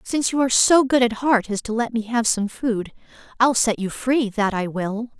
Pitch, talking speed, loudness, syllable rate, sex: 230 Hz, 240 wpm, -20 LUFS, 5.1 syllables/s, female